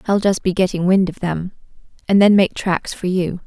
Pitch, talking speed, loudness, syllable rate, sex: 185 Hz, 225 wpm, -17 LUFS, 5.2 syllables/s, female